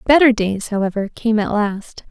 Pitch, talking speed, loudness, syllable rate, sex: 215 Hz, 170 wpm, -18 LUFS, 4.7 syllables/s, female